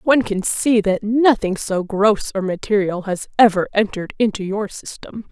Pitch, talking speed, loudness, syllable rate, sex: 205 Hz, 170 wpm, -18 LUFS, 4.8 syllables/s, female